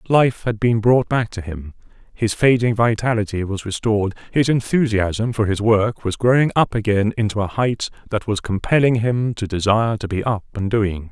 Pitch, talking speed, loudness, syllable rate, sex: 110 Hz, 190 wpm, -19 LUFS, 5.0 syllables/s, male